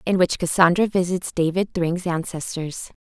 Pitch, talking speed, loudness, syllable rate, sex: 175 Hz, 140 wpm, -22 LUFS, 4.6 syllables/s, female